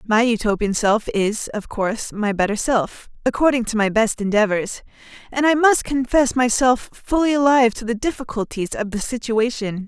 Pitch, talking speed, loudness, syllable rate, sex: 230 Hz, 150 wpm, -19 LUFS, 5.1 syllables/s, female